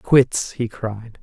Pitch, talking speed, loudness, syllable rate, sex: 120 Hz, 145 wpm, -21 LUFS, 2.5 syllables/s, male